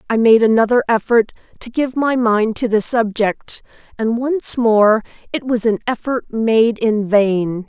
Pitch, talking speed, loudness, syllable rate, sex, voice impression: 230 Hz, 155 wpm, -16 LUFS, 4.1 syllables/s, female, very feminine, adult-like, slightly calm, slightly reassuring, elegant